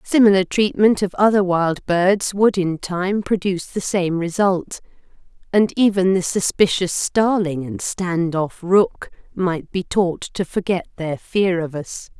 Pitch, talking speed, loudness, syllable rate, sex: 185 Hz, 155 wpm, -19 LUFS, 3.9 syllables/s, female